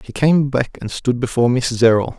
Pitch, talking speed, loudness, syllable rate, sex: 125 Hz, 220 wpm, -17 LUFS, 5.3 syllables/s, male